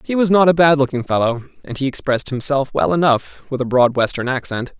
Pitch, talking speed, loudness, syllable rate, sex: 140 Hz, 225 wpm, -17 LUFS, 5.9 syllables/s, male